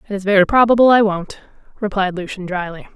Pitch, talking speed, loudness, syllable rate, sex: 200 Hz, 185 wpm, -16 LUFS, 6.4 syllables/s, female